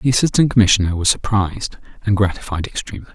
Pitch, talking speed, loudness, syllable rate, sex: 105 Hz, 155 wpm, -17 LUFS, 7.1 syllables/s, male